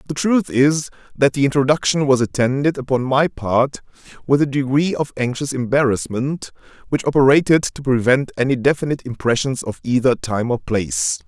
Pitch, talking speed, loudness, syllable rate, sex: 130 Hz, 150 wpm, -18 LUFS, 5.3 syllables/s, male